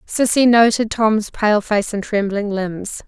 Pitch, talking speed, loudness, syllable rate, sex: 215 Hz, 155 wpm, -17 LUFS, 3.8 syllables/s, female